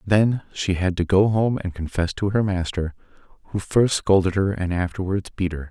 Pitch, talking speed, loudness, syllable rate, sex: 95 Hz, 200 wpm, -22 LUFS, 5.0 syllables/s, male